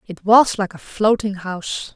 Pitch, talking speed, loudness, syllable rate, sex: 200 Hz, 185 wpm, -18 LUFS, 4.4 syllables/s, female